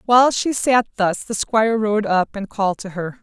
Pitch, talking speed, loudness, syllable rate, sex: 215 Hz, 225 wpm, -19 LUFS, 5.1 syllables/s, female